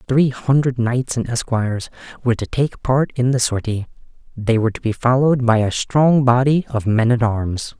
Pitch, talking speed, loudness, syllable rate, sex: 120 Hz, 190 wpm, -18 LUFS, 5.1 syllables/s, male